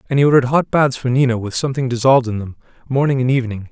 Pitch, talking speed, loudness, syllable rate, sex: 125 Hz, 240 wpm, -16 LUFS, 7.8 syllables/s, male